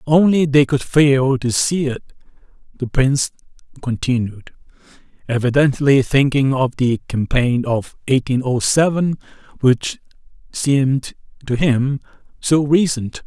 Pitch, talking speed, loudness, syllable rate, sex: 135 Hz, 115 wpm, -17 LUFS, 4.1 syllables/s, male